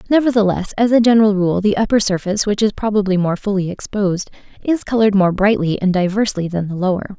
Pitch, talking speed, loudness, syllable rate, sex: 200 Hz, 190 wpm, -16 LUFS, 6.5 syllables/s, female